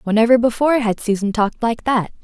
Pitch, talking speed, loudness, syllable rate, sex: 230 Hz, 190 wpm, -17 LUFS, 6.3 syllables/s, female